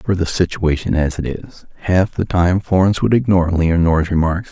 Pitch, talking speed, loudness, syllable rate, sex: 90 Hz, 200 wpm, -16 LUFS, 6.0 syllables/s, male